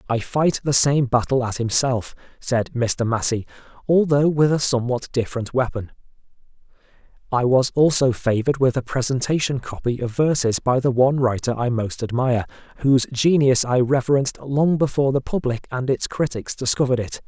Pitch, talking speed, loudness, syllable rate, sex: 130 Hz, 160 wpm, -20 LUFS, 5.5 syllables/s, male